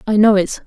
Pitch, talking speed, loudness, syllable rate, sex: 205 Hz, 270 wpm, -14 LUFS, 6.0 syllables/s, female